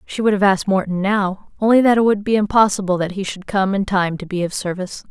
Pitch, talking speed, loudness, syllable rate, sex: 195 Hz, 260 wpm, -18 LUFS, 6.2 syllables/s, female